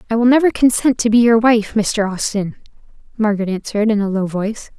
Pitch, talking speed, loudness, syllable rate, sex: 220 Hz, 200 wpm, -16 LUFS, 6.0 syllables/s, female